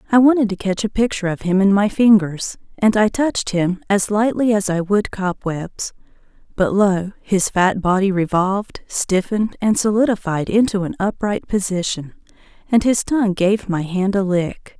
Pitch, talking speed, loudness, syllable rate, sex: 200 Hz, 170 wpm, -18 LUFS, 4.8 syllables/s, female